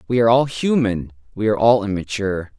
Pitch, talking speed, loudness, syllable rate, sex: 110 Hz, 185 wpm, -19 LUFS, 6.4 syllables/s, male